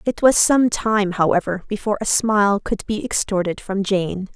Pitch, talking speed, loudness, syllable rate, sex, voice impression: 200 Hz, 180 wpm, -19 LUFS, 4.9 syllables/s, female, feminine, adult-like, tensed, slightly powerful, bright, slightly soft, slightly muffled, raspy, intellectual, slightly friendly, elegant, lively, sharp